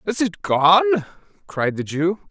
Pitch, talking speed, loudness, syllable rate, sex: 160 Hz, 155 wpm, -19 LUFS, 4.2 syllables/s, male